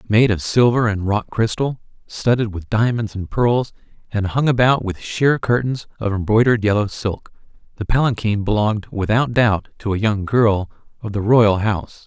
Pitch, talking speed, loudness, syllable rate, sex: 110 Hz, 170 wpm, -18 LUFS, 4.9 syllables/s, male